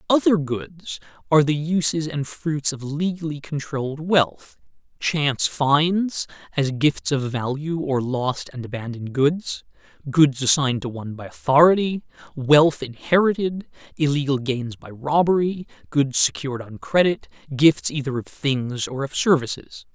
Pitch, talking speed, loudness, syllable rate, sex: 140 Hz, 135 wpm, -21 LUFS, 4.4 syllables/s, male